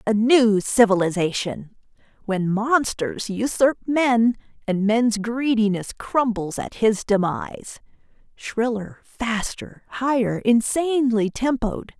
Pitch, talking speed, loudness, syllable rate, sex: 225 Hz, 95 wpm, -21 LUFS, 3.8 syllables/s, female